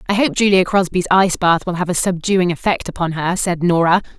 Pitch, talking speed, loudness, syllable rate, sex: 180 Hz, 215 wpm, -16 LUFS, 5.8 syllables/s, female